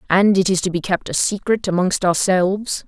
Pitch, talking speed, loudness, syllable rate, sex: 190 Hz, 210 wpm, -18 LUFS, 5.2 syllables/s, female